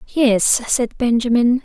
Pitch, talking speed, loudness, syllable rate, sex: 240 Hz, 110 wpm, -16 LUFS, 3.4 syllables/s, female